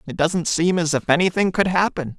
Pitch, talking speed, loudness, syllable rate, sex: 170 Hz, 220 wpm, -19 LUFS, 5.4 syllables/s, male